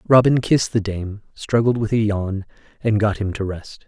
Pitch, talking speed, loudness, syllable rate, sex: 105 Hz, 200 wpm, -20 LUFS, 4.8 syllables/s, male